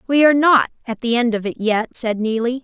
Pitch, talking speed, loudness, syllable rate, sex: 240 Hz, 250 wpm, -17 LUFS, 5.8 syllables/s, female